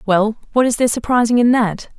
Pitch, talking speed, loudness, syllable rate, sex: 230 Hz, 210 wpm, -16 LUFS, 6.1 syllables/s, female